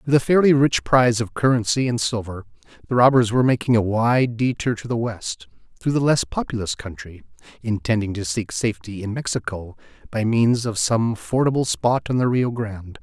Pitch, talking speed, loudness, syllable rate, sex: 115 Hz, 185 wpm, -21 LUFS, 5.4 syllables/s, male